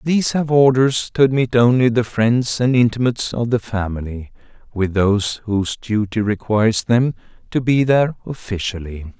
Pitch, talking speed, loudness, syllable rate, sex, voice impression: 115 Hz, 150 wpm, -17 LUFS, 5.0 syllables/s, male, masculine, slightly young, adult-like, slightly thick, slightly tensed, slightly weak, bright, soft, clear, fluent, cool, slightly intellectual, refreshing, sincere, very calm, very reassuring, elegant, slightly sweet, kind